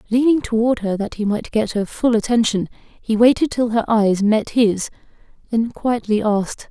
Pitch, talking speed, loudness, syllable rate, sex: 225 Hz, 180 wpm, -18 LUFS, 4.7 syllables/s, female